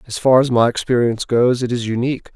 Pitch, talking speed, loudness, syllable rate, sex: 120 Hz, 230 wpm, -17 LUFS, 6.4 syllables/s, male